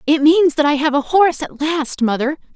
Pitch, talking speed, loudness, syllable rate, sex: 300 Hz, 235 wpm, -16 LUFS, 5.3 syllables/s, female